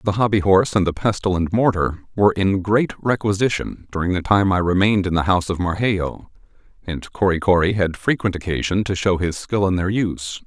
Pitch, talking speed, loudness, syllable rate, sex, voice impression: 95 Hz, 200 wpm, -19 LUFS, 5.6 syllables/s, male, masculine, adult-like, slightly thick, cool, slightly intellectual, slightly refreshing, slightly calm